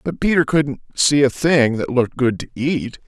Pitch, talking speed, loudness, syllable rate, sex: 140 Hz, 215 wpm, -18 LUFS, 4.7 syllables/s, male